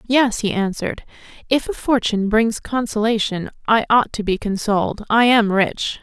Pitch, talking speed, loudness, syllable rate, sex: 220 Hz, 160 wpm, -19 LUFS, 4.8 syllables/s, female